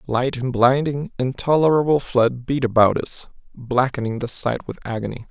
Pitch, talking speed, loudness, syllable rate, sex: 130 Hz, 145 wpm, -20 LUFS, 4.8 syllables/s, male